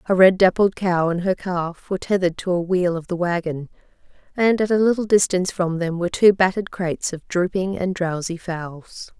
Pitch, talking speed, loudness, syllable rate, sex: 180 Hz, 200 wpm, -20 LUFS, 5.4 syllables/s, female